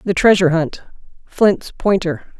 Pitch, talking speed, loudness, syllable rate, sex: 180 Hz, 100 wpm, -16 LUFS, 4.3 syllables/s, female